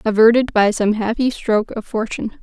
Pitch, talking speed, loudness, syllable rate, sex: 220 Hz, 175 wpm, -17 LUFS, 5.6 syllables/s, female